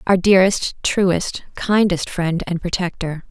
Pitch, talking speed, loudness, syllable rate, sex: 180 Hz, 125 wpm, -18 LUFS, 4.0 syllables/s, female